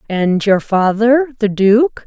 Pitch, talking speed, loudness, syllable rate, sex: 220 Hz, 115 wpm, -14 LUFS, 3.4 syllables/s, female